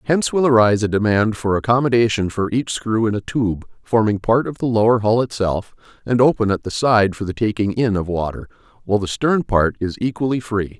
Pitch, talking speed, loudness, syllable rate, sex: 110 Hz, 210 wpm, -18 LUFS, 5.7 syllables/s, male